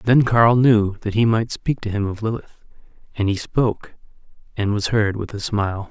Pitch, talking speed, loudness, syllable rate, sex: 110 Hz, 205 wpm, -20 LUFS, 4.9 syllables/s, male